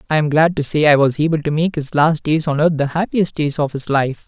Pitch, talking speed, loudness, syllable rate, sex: 150 Hz, 295 wpm, -16 LUFS, 5.7 syllables/s, male